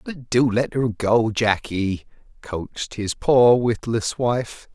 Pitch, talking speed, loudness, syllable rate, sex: 115 Hz, 140 wpm, -21 LUFS, 3.5 syllables/s, male